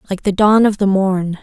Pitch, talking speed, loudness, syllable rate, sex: 195 Hz, 250 wpm, -14 LUFS, 4.9 syllables/s, female